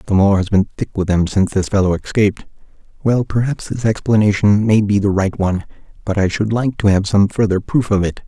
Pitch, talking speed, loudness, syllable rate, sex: 100 Hz, 225 wpm, -16 LUFS, 5.7 syllables/s, male